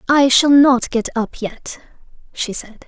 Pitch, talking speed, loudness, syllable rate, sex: 250 Hz, 165 wpm, -16 LUFS, 3.9 syllables/s, female